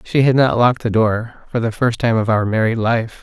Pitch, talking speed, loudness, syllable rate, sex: 115 Hz, 240 wpm, -17 LUFS, 5.4 syllables/s, male